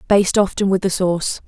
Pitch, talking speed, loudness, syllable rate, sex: 190 Hz, 205 wpm, -18 LUFS, 6.2 syllables/s, female